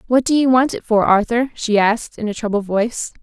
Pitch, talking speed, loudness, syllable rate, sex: 225 Hz, 240 wpm, -17 LUFS, 5.8 syllables/s, female